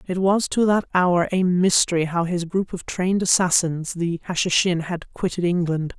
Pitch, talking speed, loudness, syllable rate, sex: 175 Hz, 160 wpm, -21 LUFS, 4.8 syllables/s, female